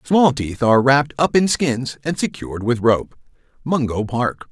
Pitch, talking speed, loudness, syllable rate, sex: 130 Hz, 175 wpm, -18 LUFS, 4.9 syllables/s, male